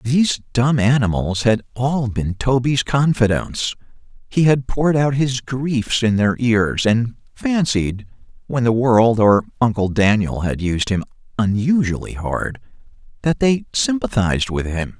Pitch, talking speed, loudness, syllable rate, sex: 120 Hz, 140 wpm, -18 LUFS, 4.1 syllables/s, male